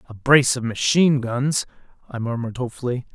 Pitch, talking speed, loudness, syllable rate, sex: 125 Hz, 150 wpm, -20 LUFS, 6.5 syllables/s, male